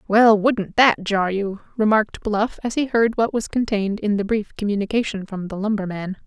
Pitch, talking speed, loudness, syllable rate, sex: 210 Hz, 190 wpm, -20 LUFS, 5.2 syllables/s, female